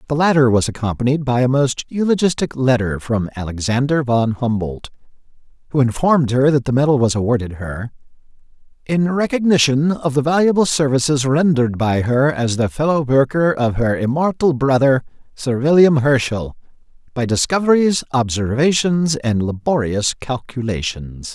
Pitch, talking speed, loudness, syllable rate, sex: 135 Hz, 135 wpm, -17 LUFS, 5.0 syllables/s, male